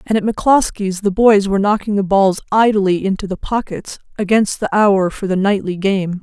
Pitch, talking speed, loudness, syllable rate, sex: 200 Hz, 195 wpm, -15 LUFS, 5.2 syllables/s, female